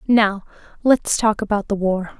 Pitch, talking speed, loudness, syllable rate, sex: 210 Hz, 165 wpm, -19 LUFS, 4.4 syllables/s, female